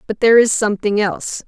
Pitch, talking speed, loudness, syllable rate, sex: 215 Hz, 205 wpm, -15 LUFS, 6.8 syllables/s, female